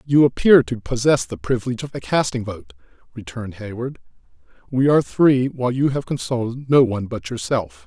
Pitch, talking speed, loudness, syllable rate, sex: 120 Hz, 175 wpm, -20 LUFS, 5.7 syllables/s, male